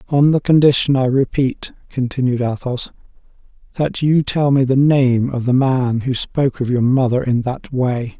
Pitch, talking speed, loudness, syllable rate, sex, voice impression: 130 Hz, 175 wpm, -17 LUFS, 4.6 syllables/s, male, masculine, adult-like, tensed, soft, halting, intellectual, friendly, reassuring, slightly wild, kind, slightly modest